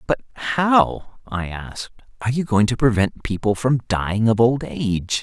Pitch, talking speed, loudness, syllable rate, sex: 115 Hz, 170 wpm, -20 LUFS, 4.8 syllables/s, male